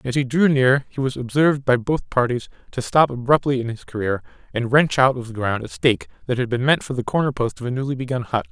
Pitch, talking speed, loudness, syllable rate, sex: 125 Hz, 260 wpm, -20 LUFS, 6.1 syllables/s, male